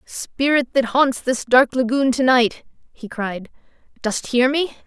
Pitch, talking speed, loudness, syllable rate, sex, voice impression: 250 Hz, 160 wpm, -19 LUFS, 3.9 syllables/s, female, very feminine, slightly young, slightly adult-like, very thin, tensed, slightly powerful, bright, very hard, very clear, very fluent, slightly cute, cool, intellectual, very refreshing, very sincere, slightly calm, friendly, very reassuring, unique, elegant, slightly wild, very sweet, lively, strict, slightly intense, slightly sharp